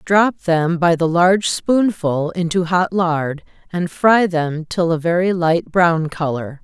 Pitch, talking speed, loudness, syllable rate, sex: 170 Hz, 165 wpm, -17 LUFS, 3.7 syllables/s, female